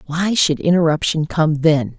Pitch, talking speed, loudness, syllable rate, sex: 160 Hz, 150 wpm, -16 LUFS, 4.4 syllables/s, female